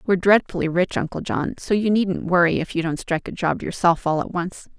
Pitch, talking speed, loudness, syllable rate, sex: 180 Hz, 240 wpm, -21 LUFS, 5.7 syllables/s, female